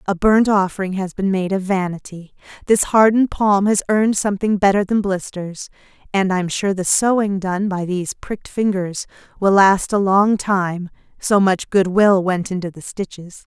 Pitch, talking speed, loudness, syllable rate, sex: 195 Hz, 175 wpm, -18 LUFS, 4.8 syllables/s, female